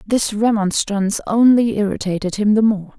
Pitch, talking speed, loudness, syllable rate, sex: 210 Hz, 140 wpm, -17 LUFS, 5.1 syllables/s, female